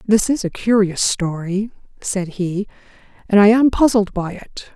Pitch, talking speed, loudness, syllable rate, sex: 200 Hz, 165 wpm, -17 LUFS, 4.4 syllables/s, female